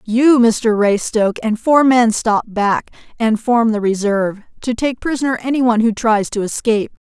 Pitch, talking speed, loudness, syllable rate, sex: 225 Hz, 180 wpm, -16 LUFS, 4.9 syllables/s, female